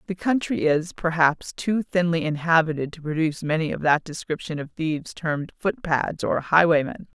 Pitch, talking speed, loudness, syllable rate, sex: 165 Hz, 160 wpm, -23 LUFS, 5.1 syllables/s, female